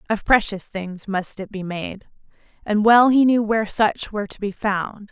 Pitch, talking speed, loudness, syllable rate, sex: 210 Hz, 200 wpm, -20 LUFS, 4.7 syllables/s, female